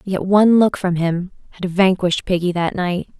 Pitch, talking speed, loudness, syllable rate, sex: 185 Hz, 190 wpm, -17 LUFS, 5.2 syllables/s, female